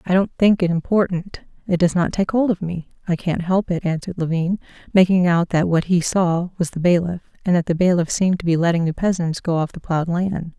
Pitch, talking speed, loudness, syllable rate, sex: 175 Hz, 240 wpm, -20 LUFS, 5.7 syllables/s, female